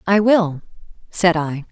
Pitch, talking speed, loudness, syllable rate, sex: 180 Hz, 140 wpm, -17 LUFS, 3.7 syllables/s, female